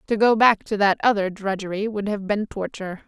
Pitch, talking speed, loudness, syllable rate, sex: 205 Hz, 215 wpm, -21 LUFS, 5.6 syllables/s, female